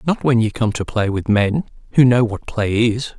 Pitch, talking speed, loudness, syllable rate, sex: 115 Hz, 245 wpm, -18 LUFS, 4.8 syllables/s, male